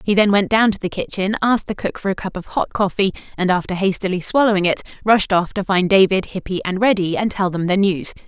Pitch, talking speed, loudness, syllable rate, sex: 195 Hz, 245 wpm, -18 LUFS, 6.0 syllables/s, female